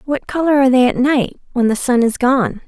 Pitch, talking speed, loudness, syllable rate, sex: 260 Hz, 245 wpm, -15 LUFS, 5.6 syllables/s, female